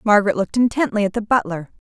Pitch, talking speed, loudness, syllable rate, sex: 215 Hz, 190 wpm, -19 LUFS, 7.3 syllables/s, female